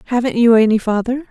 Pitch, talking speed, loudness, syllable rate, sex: 235 Hz, 185 wpm, -14 LUFS, 6.7 syllables/s, female